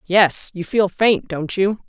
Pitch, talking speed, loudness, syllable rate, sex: 190 Hz, 190 wpm, -18 LUFS, 3.5 syllables/s, female